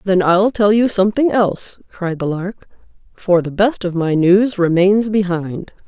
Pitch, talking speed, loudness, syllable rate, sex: 190 Hz, 175 wpm, -15 LUFS, 4.3 syllables/s, female